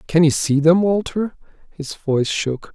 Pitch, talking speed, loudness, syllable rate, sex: 160 Hz, 175 wpm, -18 LUFS, 4.4 syllables/s, male